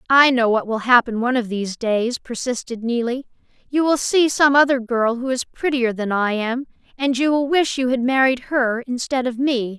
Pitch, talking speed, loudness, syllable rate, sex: 250 Hz, 210 wpm, -19 LUFS, 5.0 syllables/s, female